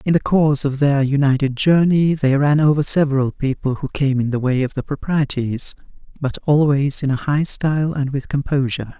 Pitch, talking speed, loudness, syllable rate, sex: 140 Hz, 195 wpm, -18 LUFS, 5.2 syllables/s, female